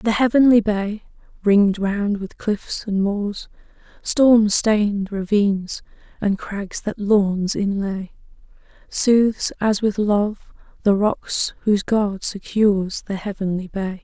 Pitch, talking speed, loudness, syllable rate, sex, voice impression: 205 Hz, 125 wpm, -20 LUFS, 3.7 syllables/s, female, very feminine, young, very thin, relaxed, weak, dark, very soft, muffled, fluent, raspy, very cute, very intellectual, slightly refreshing, sincere, very calm, friendly, slightly reassuring, very unique, very elegant, very sweet, very kind, very modest, light